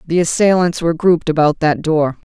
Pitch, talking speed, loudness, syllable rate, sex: 165 Hz, 180 wpm, -15 LUFS, 5.7 syllables/s, female